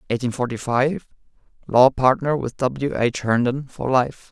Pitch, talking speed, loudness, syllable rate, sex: 130 Hz, 140 wpm, -20 LUFS, 4.6 syllables/s, male